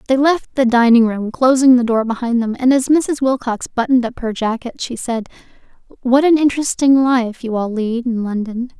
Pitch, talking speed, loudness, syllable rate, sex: 245 Hz, 200 wpm, -16 LUFS, 5.1 syllables/s, female